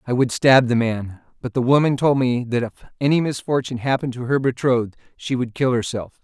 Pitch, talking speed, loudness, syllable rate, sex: 125 Hz, 210 wpm, -20 LUFS, 5.9 syllables/s, male